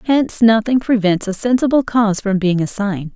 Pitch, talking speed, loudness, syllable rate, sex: 215 Hz, 190 wpm, -16 LUFS, 5.3 syllables/s, female